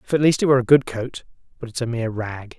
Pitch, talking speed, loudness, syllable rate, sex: 125 Hz, 300 wpm, -20 LUFS, 6.9 syllables/s, male